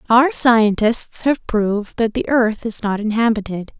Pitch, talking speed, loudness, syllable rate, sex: 225 Hz, 160 wpm, -17 LUFS, 4.2 syllables/s, female